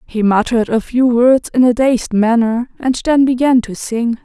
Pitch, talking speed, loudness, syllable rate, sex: 240 Hz, 200 wpm, -14 LUFS, 4.6 syllables/s, female